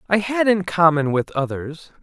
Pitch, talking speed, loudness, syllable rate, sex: 175 Hz, 180 wpm, -19 LUFS, 4.5 syllables/s, male